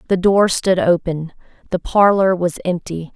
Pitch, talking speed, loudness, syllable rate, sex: 180 Hz, 150 wpm, -17 LUFS, 4.4 syllables/s, female